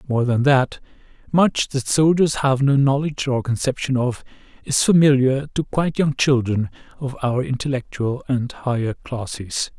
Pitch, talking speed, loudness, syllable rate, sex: 130 Hz, 145 wpm, -20 LUFS, 4.6 syllables/s, male